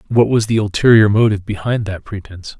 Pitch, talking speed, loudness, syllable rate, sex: 105 Hz, 185 wpm, -15 LUFS, 6.3 syllables/s, male